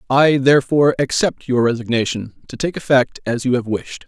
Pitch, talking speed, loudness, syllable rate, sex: 130 Hz, 175 wpm, -17 LUFS, 5.4 syllables/s, male